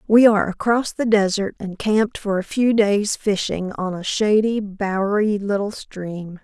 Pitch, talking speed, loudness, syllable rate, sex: 205 Hz, 170 wpm, -20 LUFS, 4.3 syllables/s, female